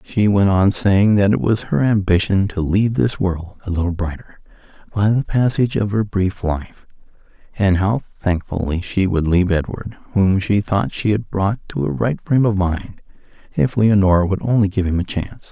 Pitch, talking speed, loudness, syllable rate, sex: 100 Hz, 195 wpm, -18 LUFS, 4.9 syllables/s, male